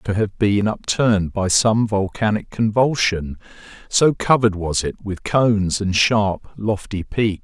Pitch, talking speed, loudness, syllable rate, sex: 105 Hz, 145 wpm, -19 LUFS, 4.1 syllables/s, male